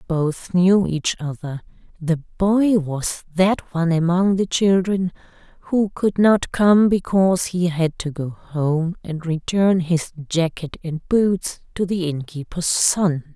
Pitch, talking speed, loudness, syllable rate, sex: 175 Hz, 145 wpm, -20 LUFS, 3.7 syllables/s, female